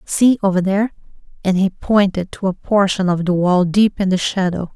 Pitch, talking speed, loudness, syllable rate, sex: 190 Hz, 200 wpm, -17 LUFS, 5.1 syllables/s, female